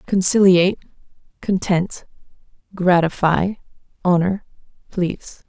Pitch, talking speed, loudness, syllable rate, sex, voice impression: 185 Hz, 55 wpm, -18 LUFS, 4.1 syllables/s, female, very feminine, very adult-like, slightly middle-aged, slightly tensed, slightly weak, slightly dark, hard, muffled, slightly fluent, slightly raspy, very cool, very intellectual, sincere, very calm, slightly mature, very friendly, very reassuring, very unique, elegant, very wild, sweet, kind, modest